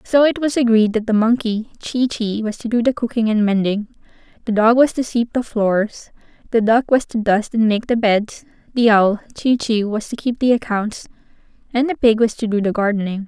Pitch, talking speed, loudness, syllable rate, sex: 225 Hz, 220 wpm, -18 LUFS, 5.1 syllables/s, female